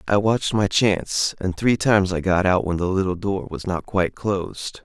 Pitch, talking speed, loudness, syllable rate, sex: 95 Hz, 225 wpm, -21 LUFS, 5.2 syllables/s, male